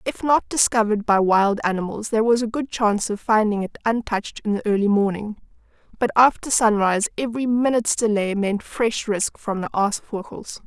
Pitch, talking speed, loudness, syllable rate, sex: 215 Hz, 175 wpm, -21 LUFS, 5.6 syllables/s, female